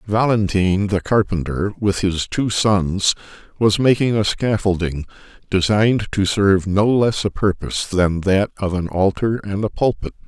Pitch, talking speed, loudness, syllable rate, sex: 100 Hz, 150 wpm, -18 LUFS, 4.6 syllables/s, male